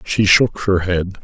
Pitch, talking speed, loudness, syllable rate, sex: 95 Hz, 195 wpm, -15 LUFS, 3.6 syllables/s, male